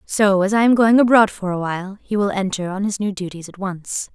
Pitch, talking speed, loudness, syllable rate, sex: 200 Hz, 260 wpm, -18 LUFS, 5.5 syllables/s, female